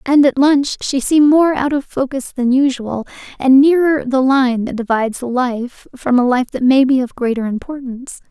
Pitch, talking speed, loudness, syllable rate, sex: 260 Hz, 195 wpm, -15 LUFS, 4.8 syllables/s, female